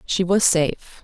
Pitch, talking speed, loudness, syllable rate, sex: 175 Hz, 175 wpm, -19 LUFS, 4.4 syllables/s, female